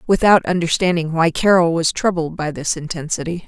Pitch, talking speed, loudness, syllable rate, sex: 170 Hz, 155 wpm, -17 LUFS, 5.4 syllables/s, female